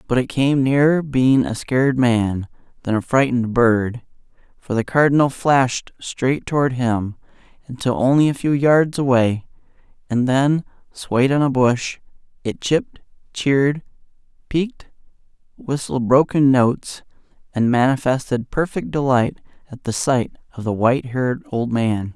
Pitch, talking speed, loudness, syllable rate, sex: 130 Hz, 140 wpm, -19 LUFS, 4.5 syllables/s, male